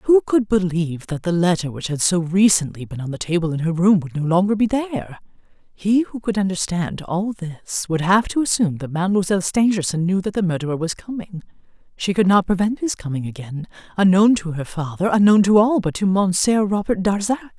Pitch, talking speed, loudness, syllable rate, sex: 185 Hz, 200 wpm, -19 LUFS, 5.7 syllables/s, female